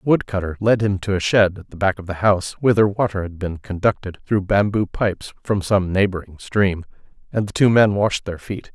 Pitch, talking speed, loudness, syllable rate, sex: 100 Hz, 220 wpm, -20 LUFS, 5.5 syllables/s, male